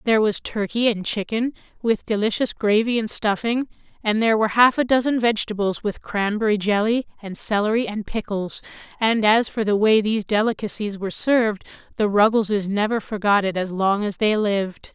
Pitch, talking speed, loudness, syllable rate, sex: 215 Hz, 175 wpm, -21 LUFS, 5.5 syllables/s, female